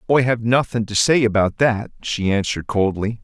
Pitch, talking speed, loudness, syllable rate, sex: 110 Hz, 185 wpm, -19 LUFS, 5.1 syllables/s, male